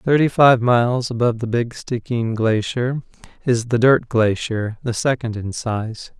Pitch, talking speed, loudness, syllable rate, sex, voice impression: 120 Hz, 155 wpm, -19 LUFS, 4.2 syllables/s, male, masculine, adult-like, slightly weak, slightly dark, calm, modest